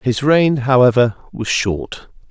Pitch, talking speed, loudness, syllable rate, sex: 125 Hz, 130 wpm, -15 LUFS, 3.5 syllables/s, male